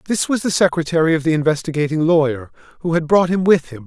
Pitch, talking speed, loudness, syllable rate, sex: 160 Hz, 220 wpm, -17 LUFS, 6.5 syllables/s, male